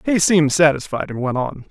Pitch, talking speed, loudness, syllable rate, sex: 150 Hz, 210 wpm, -17 LUFS, 5.7 syllables/s, male